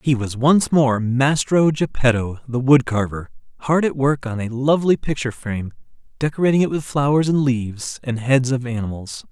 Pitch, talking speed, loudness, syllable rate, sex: 130 Hz, 175 wpm, -19 LUFS, 5.2 syllables/s, male